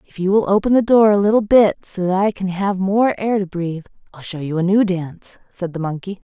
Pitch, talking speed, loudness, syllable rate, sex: 195 Hz, 255 wpm, -17 LUFS, 5.6 syllables/s, female